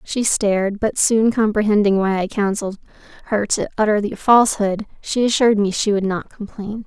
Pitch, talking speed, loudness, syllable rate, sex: 210 Hz, 175 wpm, -18 LUFS, 5.3 syllables/s, female